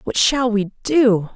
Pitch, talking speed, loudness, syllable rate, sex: 230 Hz, 175 wpm, -17 LUFS, 3.3 syllables/s, female